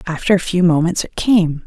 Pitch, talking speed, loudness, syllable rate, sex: 175 Hz, 215 wpm, -16 LUFS, 5.2 syllables/s, female